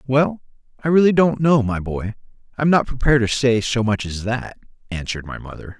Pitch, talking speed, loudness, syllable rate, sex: 125 Hz, 205 wpm, -19 LUFS, 5.7 syllables/s, male